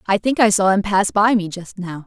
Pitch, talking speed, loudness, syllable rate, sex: 195 Hz, 290 wpm, -16 LUFS, 5.1 syllables/s, female